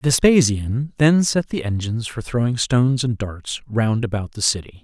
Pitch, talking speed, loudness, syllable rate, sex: 120 Hz, 175 wpm, -20 LUFS, 4.7 syllables/s, male